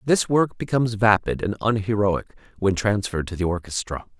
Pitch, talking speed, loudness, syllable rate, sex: 105 Hz, 155 wpm, -23 LUFS, 5.6 syllables/s, male